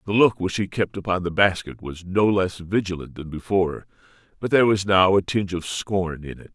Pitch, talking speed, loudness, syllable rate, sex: 95 Hz, 220 wpm, -22 LUFS, 5.4 syllables/s, male